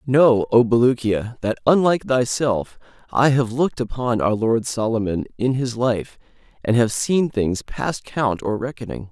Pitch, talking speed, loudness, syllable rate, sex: 120 Hz, 160 wpm, -20 LUFS, 4.4 syllables/s, male